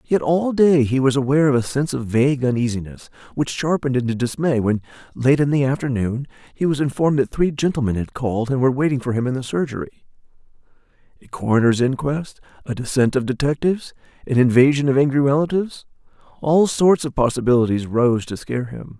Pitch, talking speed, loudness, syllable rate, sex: 135 Hz, 175 wpm, -19 LUFS, 6.3 syllables/s, male